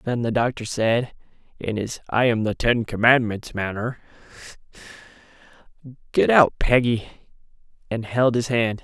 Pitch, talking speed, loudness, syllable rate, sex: 115 Hz, 130 wpm, -21 LUFS, 4.4 syllables/s, male